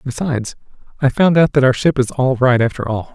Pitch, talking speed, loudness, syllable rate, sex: 130 Hz, 230 wpm, -16 LUFS, 6.2 syllables/s, male